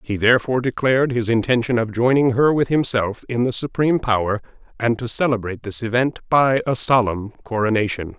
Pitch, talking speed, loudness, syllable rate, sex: 120 Hz, 170 wpm, -19 LUFS, 5.8 syllables/s, male